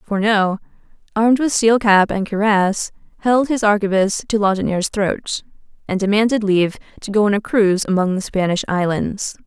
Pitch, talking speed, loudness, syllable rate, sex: 205 Hz, 160 wpm, -17 LUFS, 5.4 syllables/s, female